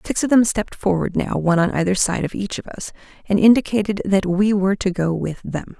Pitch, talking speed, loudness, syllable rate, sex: 195 Hz, 240 wpm, -19 LUFS, 5.9 syllables/s, female